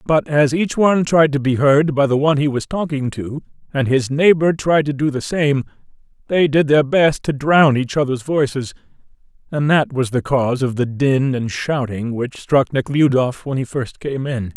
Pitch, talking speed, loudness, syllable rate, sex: 140 Hz, 205 wpm, -17 LUFS, 4.7 syllables/s, male